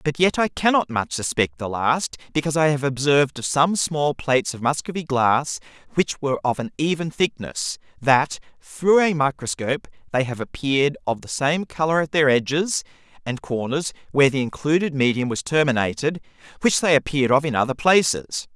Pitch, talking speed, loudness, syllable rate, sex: 140 Hz, 175 wpm, -21 LUFS, 5.3 syllables/s, male